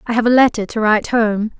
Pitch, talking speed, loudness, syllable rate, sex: 225 Hz, 265 wpm, -15 LUFS, 6.3 syllables/s, female